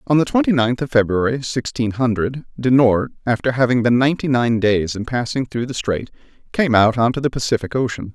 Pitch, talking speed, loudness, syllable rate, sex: 125 Hz, 205 wpm, -18 LUFS, 5.6 syllables/s, male